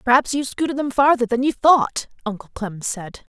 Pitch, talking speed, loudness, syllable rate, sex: 250 Hz, 195 wpm, -20 LUFS, 5.0 syllables/s, female